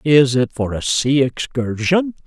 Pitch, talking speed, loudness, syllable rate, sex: 135 Hz, 160 wpm, -18 LUFS, 3.8 syllables/s, male